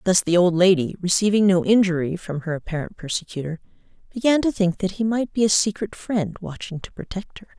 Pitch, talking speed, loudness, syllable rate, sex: 185 Hz, 200 wpm, -21 LUFS, 5.7 syllables/s, female